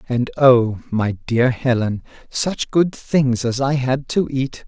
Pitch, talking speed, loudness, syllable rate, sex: 130 Hz, 165 wpm, -19 LUFS, 3.4 syllables/s, male